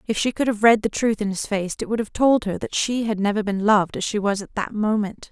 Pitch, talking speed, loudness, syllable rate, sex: 210 Hz, 305 wpm, -21 LUFS, 5.9 syllables/s, female